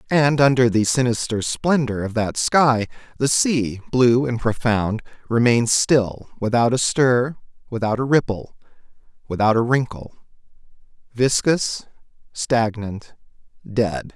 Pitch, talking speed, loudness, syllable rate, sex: 120 Hz, 110 wpm, -20 LUFS, 4.0 syllables/s, male